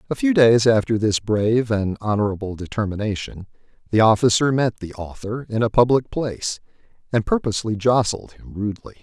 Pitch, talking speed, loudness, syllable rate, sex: 115 Hz, 155 wpm, -20 LUFS, 5.6 syllables/s, male